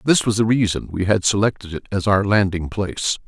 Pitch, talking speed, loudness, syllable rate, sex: 100 Hz, 220 wpm, -19 LUFS, 5.7 syllables/s, male